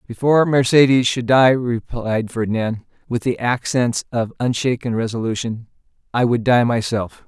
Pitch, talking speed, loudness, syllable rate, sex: 120 Hz, 130 wpm, -18 LUFS, 4.6 syllables/s, male